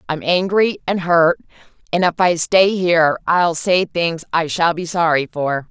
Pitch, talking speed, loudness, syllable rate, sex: 170 Hz, 180 wpm, -17 LUFS, 4.2 syllables/s, female